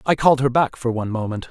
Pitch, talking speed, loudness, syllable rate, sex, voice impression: 125 Hz, 280 wpm, -20 LUFS, 7.2 syllables/s, male, very masculine, adult-like, thick, tensed, slightly weak, bright, slightly soft, clear, fluent, cool, intellectual, very refreshing, sincere, slightly calm, mature, friendly, reassuring, unique, elegant, wild, sweet, lively, strict, slightly intense, slightly sharp